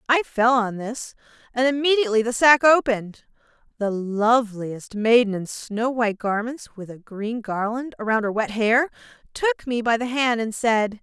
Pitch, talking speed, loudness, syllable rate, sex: 230 Hz, 170 wpm, -21 LUFS, 4.6 syllables/s, female